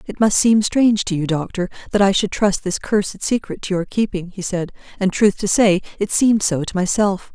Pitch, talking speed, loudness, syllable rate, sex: 195 Hz, 230 wpm, -18 LUFS, 5.2 syllables/s, female